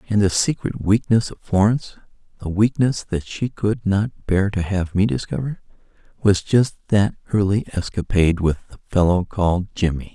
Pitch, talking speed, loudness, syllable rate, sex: 100 Hz, 155 wpm, -20 LUFS, 4.9 syllables/s, male